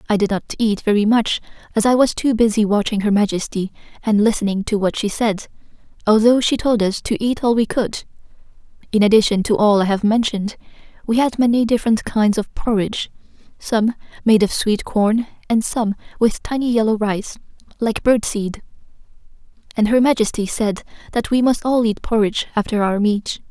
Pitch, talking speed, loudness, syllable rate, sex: 220 Hz, 180 wpm, -18 LUFS, 5.4 syllables/s, female